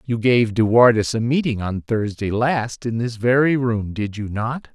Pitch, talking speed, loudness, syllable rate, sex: 115 Hz, 200 wpm, -19 LUFS, 4.3 syllables/s, male